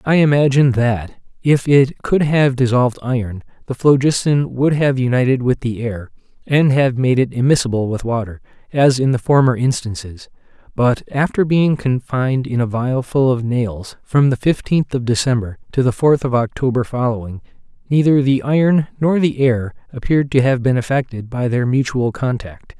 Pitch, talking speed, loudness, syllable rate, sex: 130 Hz, 170 wpm, -16 LUFS, 5.0 syllables/s, male